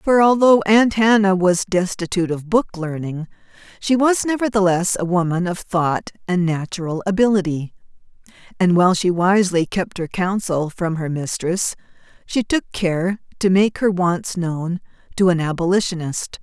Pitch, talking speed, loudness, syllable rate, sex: 185 Hz, 145 wpm, -19 LUFS, 4.7 syllables/s, female